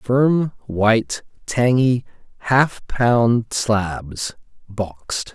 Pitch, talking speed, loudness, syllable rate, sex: 115 Hz, 80 wpm, -19 LUFS, 2.4 syllables/s, male